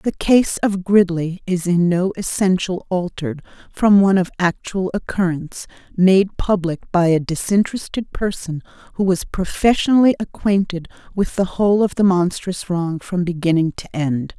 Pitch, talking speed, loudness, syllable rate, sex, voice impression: 185 Hz, 145 wpm, -18 LUFS, 4.7 syllables/s, female, very feminine, middle-aged, slightly relaxed, slightly weak, slightly bright, slightly soft, clear, fluent, slightly cute, intellectual, refreshing, sincere, calm, friendly, reassuring, unique, slightly elegant, wild, sweet, slightly lively, kind, slightly modest